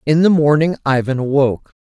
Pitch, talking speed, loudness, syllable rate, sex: 145 Hz, 165 wpm, -15 LUFS, 5.9 syllables/s, male